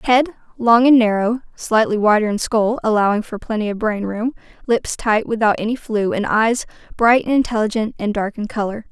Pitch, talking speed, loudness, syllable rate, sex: 220 Hz, 180 wpm, -18 LUFS, 5.2 syllables/s, female